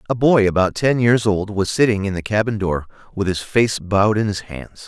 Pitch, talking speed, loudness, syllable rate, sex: 105 Hz, 235 wpm, -18 LUFS, 5.2 syllables/s, male